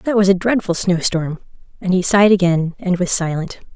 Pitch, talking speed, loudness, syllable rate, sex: 185 Hz, 190 wpm, -17 LUFS, 5.4 syllables/s, female